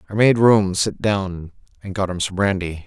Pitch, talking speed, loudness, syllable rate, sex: 95 Hz, 210 wpm, -19 LUFS, 4.6 syllables/s, male